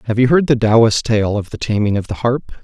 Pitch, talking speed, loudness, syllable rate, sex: 115 Hz, 275 wpm, -15 LUFS, 5.7 syllables/s, male